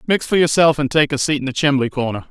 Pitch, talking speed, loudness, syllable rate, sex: 145 Hz, 285 wpm, -17 LUFS, 6.5 syllables/s, male